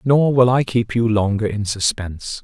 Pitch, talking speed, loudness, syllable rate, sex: 115 Hz, 195 wpm, -18 LUFS, 4.7 syllables/s, male